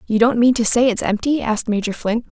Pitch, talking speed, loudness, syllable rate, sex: 230 Hz, 255 wpm, -17 LUFS, 6.1 syllables/s, female